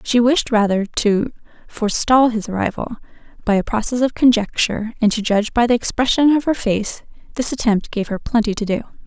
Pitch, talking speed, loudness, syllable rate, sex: 225 Hz, 185 wpm, -18 LUFS, 5.6 syllables/s, female